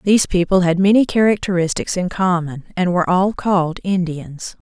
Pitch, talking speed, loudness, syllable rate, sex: 180 Hz, 155 wpm, -17 LUFS, 5.3 syllables/s, female